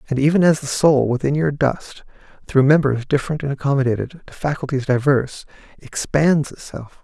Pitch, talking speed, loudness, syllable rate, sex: 140 Hz, 155 wpm, -18 LUFS, 5.5 syllables/s, male